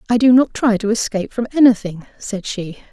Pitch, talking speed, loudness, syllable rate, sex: 220 Hz, 205 wpm, -16 LUFS, 5.8 syllables/s, female